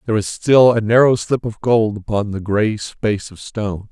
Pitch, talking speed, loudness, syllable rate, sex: 105 Hz, 215 wpm, -17 LUFS, 5.0 syllables/s, male